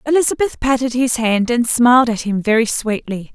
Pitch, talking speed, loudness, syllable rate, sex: 240 Hz, 180 wpm, -16 LUFS, 5.2 syllables/s, female